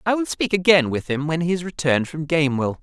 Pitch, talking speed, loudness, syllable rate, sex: 160 Hz, 255 wpm, -20 LUFS, 6.3 syllables/s, male